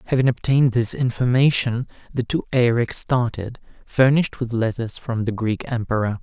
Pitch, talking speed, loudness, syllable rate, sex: 120 Hz, 145 wpm, -21 LUFS, 5.1 syllables/s, male